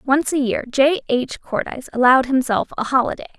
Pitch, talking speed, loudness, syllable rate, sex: 260 Hz, 175 wpm, -19 LUFS, 5.6 syllables/s, female